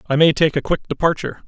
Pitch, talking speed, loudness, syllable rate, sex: 155 Hz, 245 wpm, -18 LUFS, 7.1 syllables/s, male